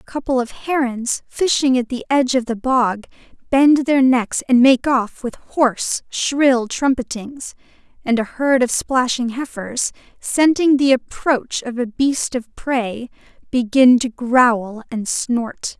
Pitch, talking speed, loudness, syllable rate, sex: 250 Hz, 150 wpm, -18 LUFS, 3.8 syllables/s, female